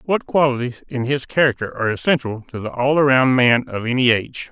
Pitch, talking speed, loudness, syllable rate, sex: 130 Hz, 200 wpm, -18 LUFS, 5.8 syllables/s, male